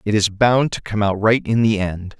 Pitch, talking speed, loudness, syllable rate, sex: 105 Hz, 275 wpm, -18 LUFS, 4.9 syllables/s, male